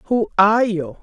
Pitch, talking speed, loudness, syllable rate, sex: 200 Hz, 175 wpm, -17 LUFS, 4.4 syllables/s, female